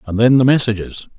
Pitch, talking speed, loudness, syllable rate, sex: 115 Hz, 205 wpm, -14 LUFS, 5.9 syllables/s, male